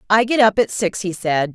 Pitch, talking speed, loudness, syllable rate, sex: 200 Hz, 270 wpm, -18 LUFS, 5.1 syllables/s, female